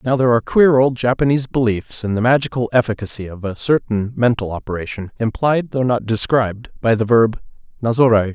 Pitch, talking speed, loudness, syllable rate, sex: 115 Hz, 170 wpm, -17 LUFS, 6.0 syllables/s, male